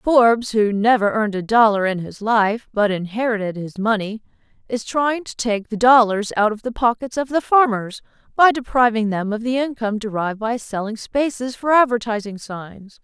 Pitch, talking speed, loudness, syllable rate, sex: 225 Hz, 180 wpm, -19 LUFS, 5.0 syllables/s, female